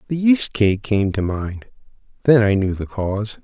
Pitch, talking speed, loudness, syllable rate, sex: 110 Hz, 190 wpm, -19 LUFS, 4.5 syllables/s, male